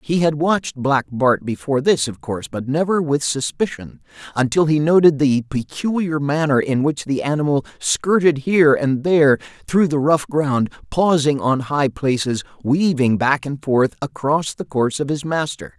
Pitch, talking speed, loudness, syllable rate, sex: 145 Hz, 170 wpm, -18 LUFS, 4.7 syllables/s, male